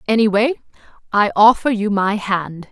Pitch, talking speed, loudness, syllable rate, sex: 210 Hz, 130 wpm, -16 LUFS, 4.6 syllables/s, female